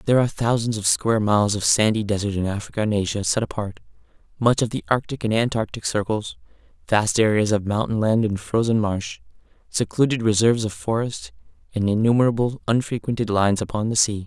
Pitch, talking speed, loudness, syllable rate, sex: 110 Hz, 170 wpm, -21 LUFS, 6.1 syllables/s, male